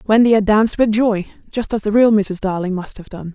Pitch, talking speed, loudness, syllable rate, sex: 210 Hz, 250 wpm, -16 LUFS, 5.8 syllables/s, female